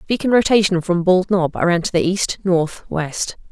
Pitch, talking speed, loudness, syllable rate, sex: 180 Hz, 205 wpm, -18 LUFS, 4.6 syllables/s, female